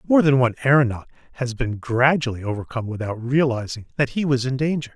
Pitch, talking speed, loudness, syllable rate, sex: 130 Hz, 180 wpm, -21 LUFS, 6.4 syllables/s, male